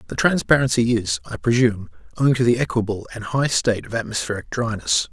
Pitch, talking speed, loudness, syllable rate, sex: 120 Hz, 175 wpm, -21 LUFS, 6.2 syllables/s, male